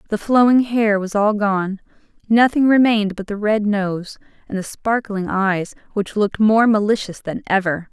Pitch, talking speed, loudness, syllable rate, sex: 210 Hz, 165 wpm, -18 LUFS, 4.6 syllables/s, female